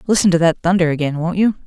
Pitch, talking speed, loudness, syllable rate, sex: 175 Hz, 250 wpm, -16 LUFS, 6.9 syllables/s, female